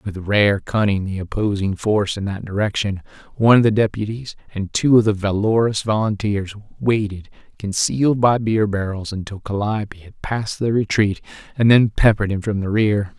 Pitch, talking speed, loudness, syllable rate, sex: 105 Hz, 165 wpm, -19 LUFS, 5.1 syllables/s, male